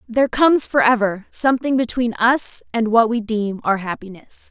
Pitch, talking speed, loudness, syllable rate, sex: 230 Hz, 160 wpm, -18 LUFS, 5.0 syllables/s, female